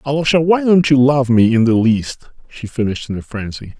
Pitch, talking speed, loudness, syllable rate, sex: 130 Hz, 220 wpm, -15 LUFS, 5.5 syllables/s, male